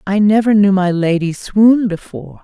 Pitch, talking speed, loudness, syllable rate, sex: 195 Hz, 175 wpm, -13 LUFS, 4.8 syllables/s, female